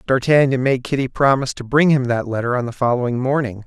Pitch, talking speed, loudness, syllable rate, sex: 130 Hz, 215 wpm, -18 LUFS, 6.2 syllables/s, male